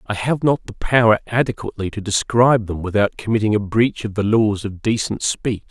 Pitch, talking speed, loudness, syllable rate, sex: 110 Hz, 200 wpm, -19 LUFS, 5.5 syllables/s, male